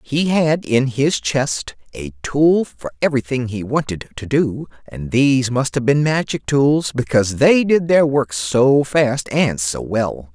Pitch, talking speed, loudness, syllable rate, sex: 130 Hz, 175 wpm, -17 LUFS, 4.0 syllables/s, male